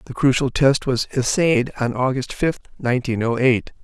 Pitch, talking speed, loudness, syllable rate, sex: 130 Hz, 170 wpm, -20 LUFS, 4.9 syllables/s, male